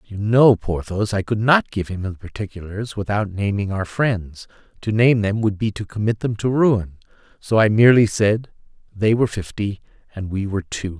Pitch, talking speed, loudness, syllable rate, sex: 105 Hz, 190 wpm, -20 LUFS, 5.0 syllables/s, male